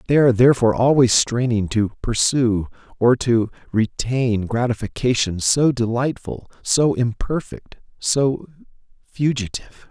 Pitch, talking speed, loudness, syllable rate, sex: 120 Hz, 105 wpm, -19 LUFS, 4.4 syllables/s, male